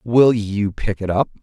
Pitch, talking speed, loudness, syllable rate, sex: 105 Hz, 210 wpm, -19 LUFS, 3.9 syllables/s, male